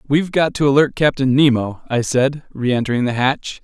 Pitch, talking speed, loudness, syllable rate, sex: 135 Hz, 180 wpm, -17 LUFS, 5.2 syllables/s, male